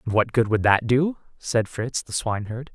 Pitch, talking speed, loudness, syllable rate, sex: 120 Hz, 220 wpm, -23 LUFS, 4.9 syllables/s, male